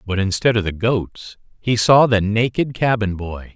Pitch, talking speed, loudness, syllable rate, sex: 110 Hz, 185 wpm, -18 LUFS, 4.4 syllables/s, male